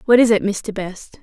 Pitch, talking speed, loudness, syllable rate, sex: 210 Hz, 245 wpm, -18 LUFS, 4.6 syllables/s, female